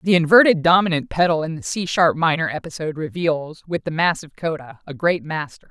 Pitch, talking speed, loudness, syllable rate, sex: 165 Hz, 190 wpm, -19 LUFS, 5.7 syllables/s, female